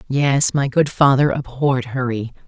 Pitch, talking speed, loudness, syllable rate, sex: 135 Hz, 145 wpm, -18 LUFS, 4.6 syllables/s, female